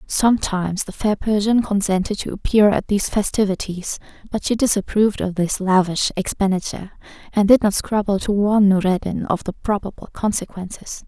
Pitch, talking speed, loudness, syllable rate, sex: 200 Hz, 150 wpm, -19 LUFS, 5.4 syllables/s, female